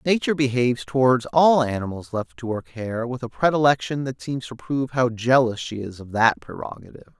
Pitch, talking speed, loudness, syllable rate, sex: 130 Hz, 190 wpm, -22 LUFS, 5.6 syllables/s, male